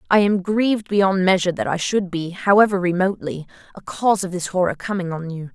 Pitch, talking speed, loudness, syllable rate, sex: 185 Hz, 205 wpm, -20 LUFS, 6.0 syllables/s, female